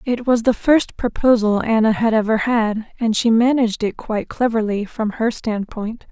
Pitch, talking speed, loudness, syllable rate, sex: 225 Hz, 175 wpm, -18 LUFS, 4.8 syllables/s, female